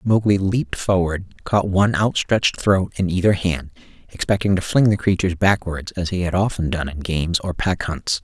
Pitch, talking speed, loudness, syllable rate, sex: 95 Hz, 190 wpm, -20 LUFS, 5.2 syllables/s, male